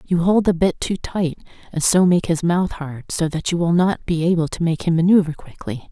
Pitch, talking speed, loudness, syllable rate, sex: 170 Hz, 245 wpm, -19 LUFS, 5.2 syllables/s, female